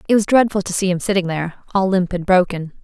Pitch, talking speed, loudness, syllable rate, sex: 185 Hz, 255 wpm, -18 LUFS, 6.7 syllables/s, female